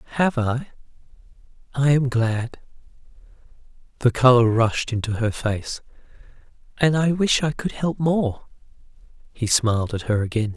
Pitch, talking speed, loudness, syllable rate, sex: 125 Hz, 130 wpm, -21 LUFS, 4.4 syllables/s, male